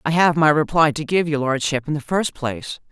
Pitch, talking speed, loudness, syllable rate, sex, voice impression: 150 Hz, 245 wpm, -19 LUFS, 5.5 syllables/s, female, slightly masculine, slightly feminine, very gender-neutral, adult-like, slightly middle-aged, slightly thin, tensed, slightly powerful, bright, hard, very clear, very fluent, cool, very intellectual, very refreshing, sincere, very calm, very friendly, reassuring, unique, slightly elegant, wild, slightly sweet, lively, slightly kind, strict, intense